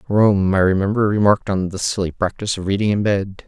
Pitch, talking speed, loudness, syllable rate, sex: 100 Hz, 205 wpm, -18 LUFS, 6.1 syllables/s, male